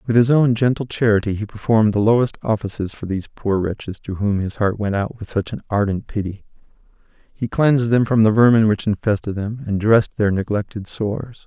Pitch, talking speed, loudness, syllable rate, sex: 110 Hz, 205 wpm, -19 LUFS, 5.8 syllables/s, male